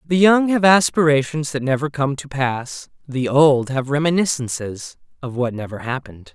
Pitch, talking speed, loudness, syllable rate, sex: 140 Hz, 160 wpm, -18 LUFS, 4.8 syllables/s, male